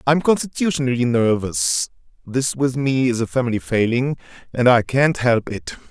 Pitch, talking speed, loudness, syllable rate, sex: 125 Hz, 150 wpm, -19 LUFS, 5.0 syllables/s, male